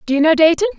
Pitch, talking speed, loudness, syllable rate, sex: 335 Hz, 305 wpm, -13 LUFS, 8.6 syllables/s, female